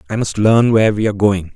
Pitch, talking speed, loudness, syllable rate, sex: 105 Hz, 270 wpm, -14 LUFS, 6.7 syllables/s, male